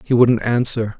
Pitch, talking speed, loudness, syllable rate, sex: 115 Hz, 180 wpm, -16 LUFS, 4.5 syllables/s, male